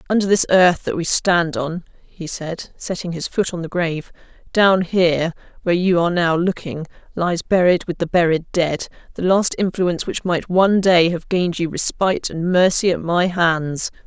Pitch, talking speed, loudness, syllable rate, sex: 175 Hz, 190 wpm, -18 LUFS, 4.9 syllables/s, female